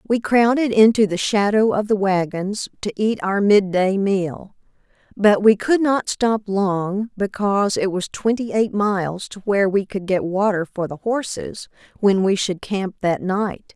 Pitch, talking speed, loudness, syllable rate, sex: 200 Hz, 175 wpm, -19 LUFS, 4.2 syllables/s, female